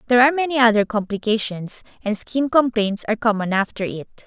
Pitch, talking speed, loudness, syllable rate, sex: 225 Hz, 170 wpm, -20 LUFS, 6.0 syllables/s, female